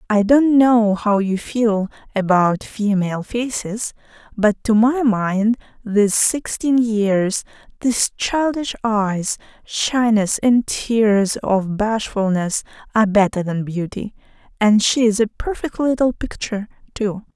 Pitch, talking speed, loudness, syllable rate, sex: 215 Hz, 125 wpm, -18 LUFS, 3.8 syllables/s, female